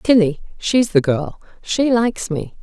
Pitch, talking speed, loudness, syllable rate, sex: 195 Hz, 115 wpm, -18 LUFS, 4.2 syllables/s, female